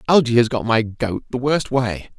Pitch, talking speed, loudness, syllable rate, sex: 120 Hz, 220 wpm, -19 LUFS, 4.8 syllables/s, male